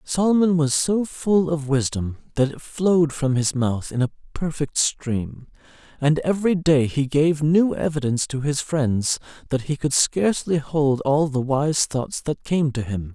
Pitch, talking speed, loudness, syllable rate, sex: 145 Hz, 180 wpm, -21 LUFS, 4.3 syllables/s, male